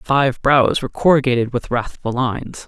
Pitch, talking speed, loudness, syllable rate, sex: 130 Hz, 155 wpm, -17 LUFS, 4.9 syllables/s, female